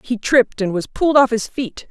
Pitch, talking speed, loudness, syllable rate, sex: 240 Hz, 250 wpm, -17 LUFS, 5.5 syllables/s, female